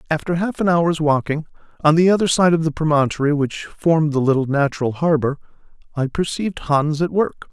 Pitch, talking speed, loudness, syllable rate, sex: 155 Hz, 185 wpm, -19 LUFS, 5.7 syllables/s, male